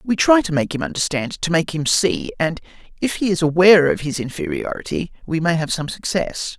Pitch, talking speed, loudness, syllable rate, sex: 170 Hz, 210 wpm, -19 LUFS, 5.4 syllables/s, male